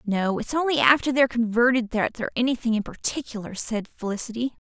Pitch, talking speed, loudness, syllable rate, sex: 235 Hz, 165 wpm, -24 LUFS, 6.1 syllables/s, female